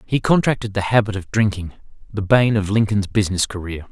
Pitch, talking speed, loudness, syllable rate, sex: 105 Hz, 185 wpm, -19 LUFS, 5.9 syllables/s, male